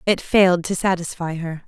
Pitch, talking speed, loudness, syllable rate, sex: 175 Hz, 180 wpm, -20 LUFS, 5.2 syllables/s, female